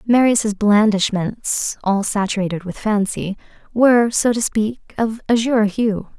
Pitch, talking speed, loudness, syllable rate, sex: 215 Hz, 125 wpm, -18 LUFS, 4.2 syllables/s, female